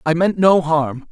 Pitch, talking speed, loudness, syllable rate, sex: 165 Hz, 215 wpm, -16 LUFS, 4.1 syllables/s, male